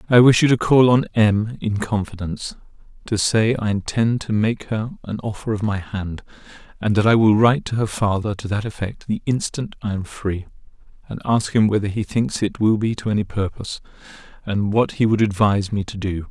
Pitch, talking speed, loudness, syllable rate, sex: 105 Hz, 210 wpm, -20 LUFS, 5.4 syllables/s, male